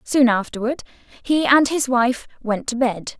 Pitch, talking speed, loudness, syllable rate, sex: 250 Hz, 170 wpm, -19 LUFS, 4.1 syllables/s, female